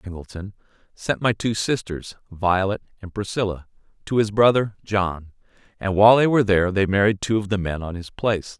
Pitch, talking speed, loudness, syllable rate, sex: 100 Hz, 195 wpm, -21 LUFS, 5.9 syllables/s, male